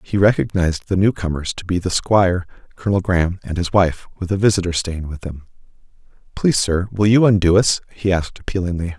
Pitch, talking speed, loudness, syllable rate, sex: 90 Hz, 185 wpm, -18 LUFS, 6.1 syllables/s, male